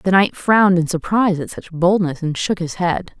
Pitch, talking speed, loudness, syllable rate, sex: 180 Hz, 225 wpm, -17 LUFS, 5.2 syllables/s, female